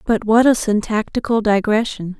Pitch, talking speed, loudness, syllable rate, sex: 220 Hz, 135 wpm, -17 LUFS, 4.9 syllables/s, female